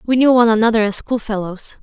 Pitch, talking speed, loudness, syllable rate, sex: 225 Hz, 195 wpm, -15 LUFS, 6.4 syllables/s, female